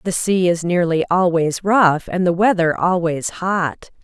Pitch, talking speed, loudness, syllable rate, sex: 175 Hz, 165 wpm, -17 LUFS, 4.0 syllables/s, female